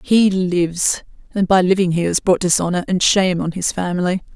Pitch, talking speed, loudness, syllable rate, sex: 185 Hz, 195 wpm, -17 LUFS, 5.4 syllables/s, female